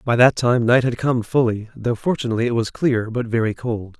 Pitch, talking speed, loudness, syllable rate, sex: 120 Hz, 225 wpm, -20 LUFS, 5.5 syllables/s, male